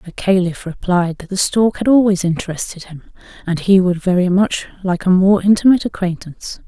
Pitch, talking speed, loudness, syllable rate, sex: 185 Hz, 180 wpm, -16 LUFS, 5.5 syllables/s, female